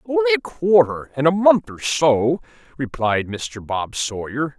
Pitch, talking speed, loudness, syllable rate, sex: 155 Hz, 155 wpm, -20 LUFS, 5.4 syllables/s, male